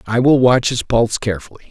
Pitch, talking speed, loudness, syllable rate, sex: 120 Hz, 210 wpm, -15 LUFS, 6.5 syllables/s, male